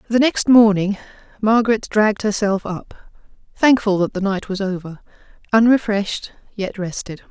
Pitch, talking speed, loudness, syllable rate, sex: 205 Hz, 125 wpm, -18 LUFS, 5.0 syllables/s, female